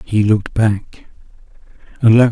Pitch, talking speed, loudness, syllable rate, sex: 110 Hz, 130 wpm, -15 LUFS, 4.5 syllables/s, male